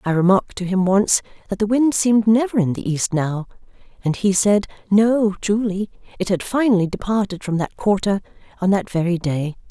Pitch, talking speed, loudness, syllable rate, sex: 200 Hz, 185 wpm, -19 LUFS, 5.3 syllables/s, female